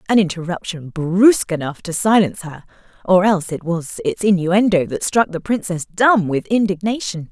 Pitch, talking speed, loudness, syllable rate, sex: 190 Hz, 165 wpm, -17 LUFS, 5.3 syllables/s, female